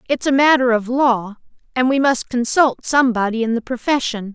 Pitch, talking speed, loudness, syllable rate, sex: 245 Hz, 180 wpm, -17 LUFS, 5.3 syllables/s, female